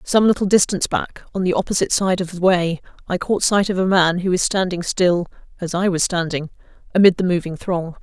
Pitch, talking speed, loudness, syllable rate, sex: 185 Hz, 215 wpm, -19 LUFS, 5.5 syllables/s, female